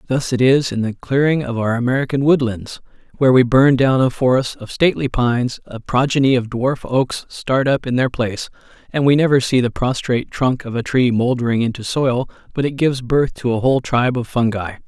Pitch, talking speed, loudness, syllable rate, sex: 125 Hz, 210 wpm, -17 LUFS, 5.6 syllables/s, male